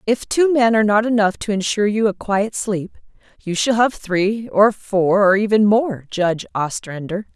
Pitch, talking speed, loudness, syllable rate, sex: 205 Hz, 190 wpm, -18 LUFS, 4.6 syllables/s, female